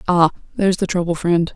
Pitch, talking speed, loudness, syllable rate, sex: 175 Hz, 195 wpm, -18 LUFS, 6.2 syllables/s, female